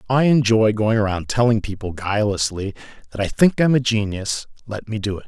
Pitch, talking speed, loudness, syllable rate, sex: 110 Hz, 205 wpm, -20 LUFS, 5.8 syllables/s, male